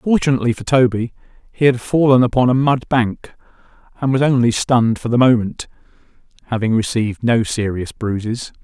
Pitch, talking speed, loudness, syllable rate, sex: 120 Hz, 155 wpm, -17 LUFS, 5.5 syllables/s, male